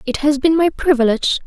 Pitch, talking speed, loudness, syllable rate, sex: 285 Hz, 205 wpm, -16 LUFS, 6.2 syllables/s, female